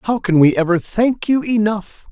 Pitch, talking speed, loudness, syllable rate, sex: 205 Hz, 200 wpm, -16 LUFS, 4.4 syllables/s, male